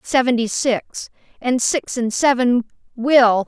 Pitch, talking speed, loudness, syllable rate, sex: 245 Hz, 120 wpm, -18 LUFS, 3.6 syllables/s, female